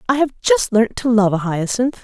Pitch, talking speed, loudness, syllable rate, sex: 235 Hz, 235 wpm, -17 LUFS, 5.0 syllables/s, female